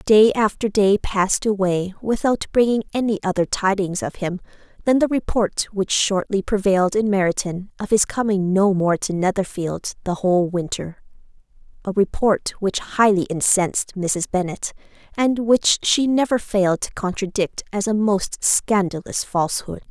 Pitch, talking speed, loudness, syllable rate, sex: 200 Hz, 150 wpm, -20 LUFS, 4.7 syllables/s, female